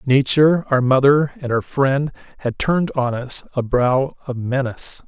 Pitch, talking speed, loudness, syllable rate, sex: 135 Hz, 165 wpm, -18 LUFS, 4.5 syllables/s, male